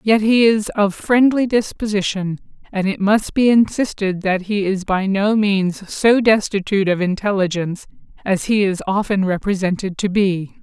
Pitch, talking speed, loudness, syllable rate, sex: 200 Hz, 160 wpm, -18 LUFS, 4.6 syllables/s, female